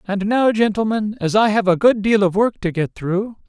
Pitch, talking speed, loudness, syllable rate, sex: 210 Hz, 240 wpm, -18 LUFS, 5.0 syllables/s, male